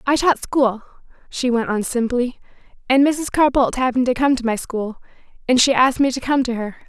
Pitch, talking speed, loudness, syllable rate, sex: 250 Hz, 220 wpm, -19 LUFS, 5.6 syllables/s, female